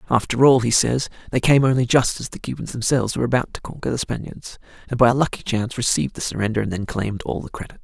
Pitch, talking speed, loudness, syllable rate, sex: 120 Hz, 245 wpm, -20 LUFS, 6.9 syllables/s, male